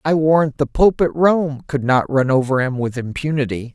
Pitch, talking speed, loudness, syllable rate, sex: 140 Hz, 210 wpm, -17 LUFS, 5.0 syllables/s, male